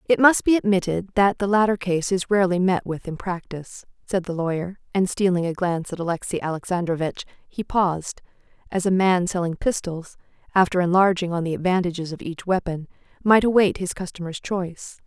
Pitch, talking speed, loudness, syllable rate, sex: 180 Hz, 175 wpm, -22 LUFS, 5.7 syllables/s, female